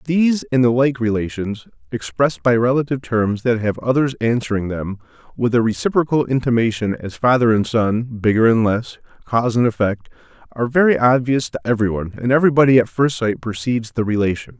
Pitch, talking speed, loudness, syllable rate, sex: 120 Hz, 175 wpm, -18 LUFS, 5.9 syllables/s, male